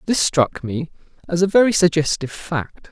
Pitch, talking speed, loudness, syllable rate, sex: 165 Hz, 165 wpm, -19 LUFS, 5.0 syllables/s, male